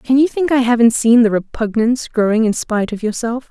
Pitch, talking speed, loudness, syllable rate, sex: 235 Hz, 225 wpm, -15 LUFS, 5.8 syllables/s, female